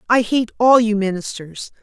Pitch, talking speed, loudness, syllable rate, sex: 220 Hz, 165 wpm, -16 LUFS, 4.7 syllables/s, female